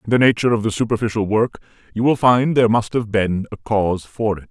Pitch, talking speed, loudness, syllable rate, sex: 110 Hz, 240 wpm, -18 LUFS, 6.4 syllables/s, male